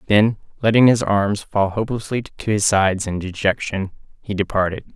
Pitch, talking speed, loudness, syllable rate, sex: 105 Hz, 155 wpm, -19 LUFS, 5.1 syllables/s, male